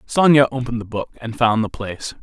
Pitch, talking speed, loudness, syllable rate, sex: 120 Hz, 215 wpm, -19 LUFS, 5.9 syllables/s, male